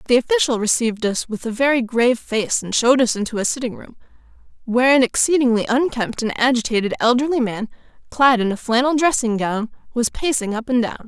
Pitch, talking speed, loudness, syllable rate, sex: 240 Hz, 190 wpm, -19 LUFS, 6.0 syllables/s, female